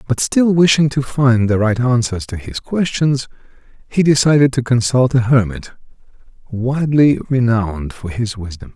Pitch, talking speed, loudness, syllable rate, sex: 125 Hz, 150 wpm, -15 LUFS, 4.8 syllables/s, male